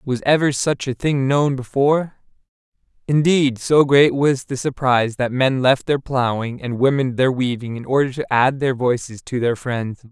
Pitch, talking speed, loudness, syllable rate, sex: 130 Hz, 185 wpm, -18 LUFS, 4.6 syllables/s, male